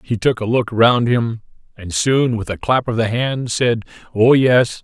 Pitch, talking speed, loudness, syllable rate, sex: 115 Hz, 210 wpm, -17 LUFS, 4.2 syllables/s, male